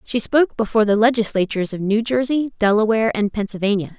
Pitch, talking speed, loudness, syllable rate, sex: 220 Hz, 165 wpm, -19 LUFS, 6.7 syllables/s, female